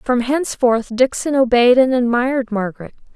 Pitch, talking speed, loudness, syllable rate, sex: 245 Hz, 135 wpm, -16 LUFS, 5.2 syllables/s, female